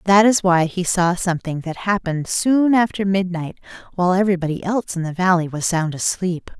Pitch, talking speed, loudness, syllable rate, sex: 180 Hz, 180 wpm, -19 LUFS, 5.6 syllables/s, female